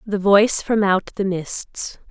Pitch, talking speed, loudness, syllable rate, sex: 195 Hz, 170 wpm, -19 LUFS, 3.6 syllables/s, female